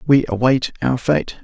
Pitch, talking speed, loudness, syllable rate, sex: 130 Hz, 165 wpm, -18 LUFS, 4.4 syllables/s, male